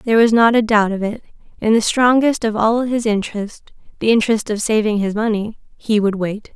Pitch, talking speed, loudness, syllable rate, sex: 220 Hz, 190 wpm, -17 LUFS, 5.6 syllables/s, female